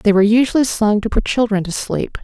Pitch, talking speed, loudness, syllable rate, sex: 215 Hz, 240 wpm, -16 LUFS, 6.0 syllables/s, female